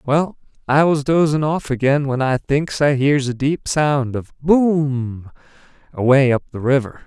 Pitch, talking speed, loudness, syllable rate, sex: 140 Hz, 170 wpm, -18 LUFS, 4.1 syllables/s, male